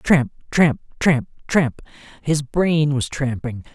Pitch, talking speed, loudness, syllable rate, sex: 140 Hz, 130 wpm, -20 LUFS, 3.3 syllables/s, male